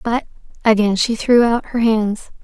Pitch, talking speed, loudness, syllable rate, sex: 225 Hz, 170 wpm, -17 LUFS, 4.2 syllables/s, female